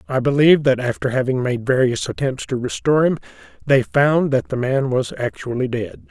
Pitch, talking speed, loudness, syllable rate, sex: 130 Hz, 185 wpm, -19 LUFS, 5.3 syllables/s, male